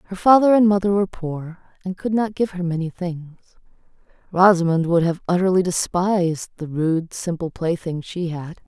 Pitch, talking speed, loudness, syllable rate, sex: 180 Hz, 165 wpm, -20 LUFS, 5.2 syllables/s, female